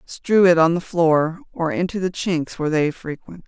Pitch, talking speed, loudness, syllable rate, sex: 170 Hz, 205 wpm, -19 LUFS, 4.7 syllables/s, female